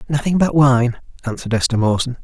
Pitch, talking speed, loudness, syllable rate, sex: 130 Hz, 160 wpm, -17 LUFS, 6.2 syllables/s, male